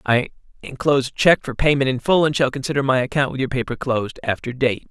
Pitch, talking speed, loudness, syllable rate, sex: 135 Hz, 220 wpm, -20 LUFS, 6.2 syllables/s, male